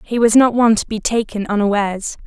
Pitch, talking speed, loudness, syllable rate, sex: 220 Hz, 210 wpm, -16 LUFS, 6.2 syllables/s, female